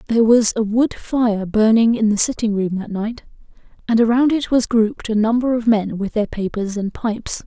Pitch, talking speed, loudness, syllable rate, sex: 220 Hz, 210 wpm, -18 LUFS, 5.1 syllables/s, female